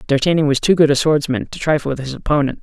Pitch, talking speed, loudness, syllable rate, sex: 145 Hz, 250 wpm, -17 LUFS, 6.9 syllables/s, male